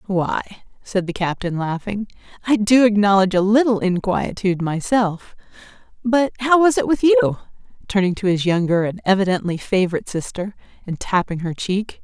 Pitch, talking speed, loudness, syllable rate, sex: 200 Hz, 145 wpm, -19 LUFS, 5.2 syllables/s, female